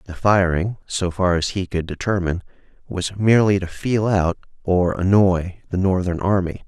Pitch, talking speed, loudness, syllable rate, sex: 95 Hz, 160 wpm, -20 LUFS, 4.8 syllables/s, male